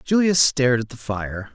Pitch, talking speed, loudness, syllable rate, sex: 130 Hz, 195 wpm, -20 LUFS, 4.9 syllables/s, male